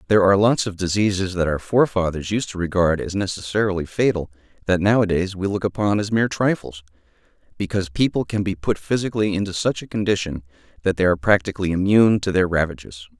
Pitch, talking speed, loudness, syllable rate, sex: 95 Hz, 180 wpm, -21 LUFS, 6.6 syllables/s, male